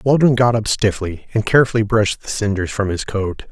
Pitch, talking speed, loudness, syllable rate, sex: 105 Hz, 205 wpm, -17 LUFS, 5.7 syllables/s, male